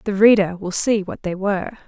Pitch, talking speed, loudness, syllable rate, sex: 200 Hz, 225 wpm, -19 LUFS, 5.6 syllables/s, female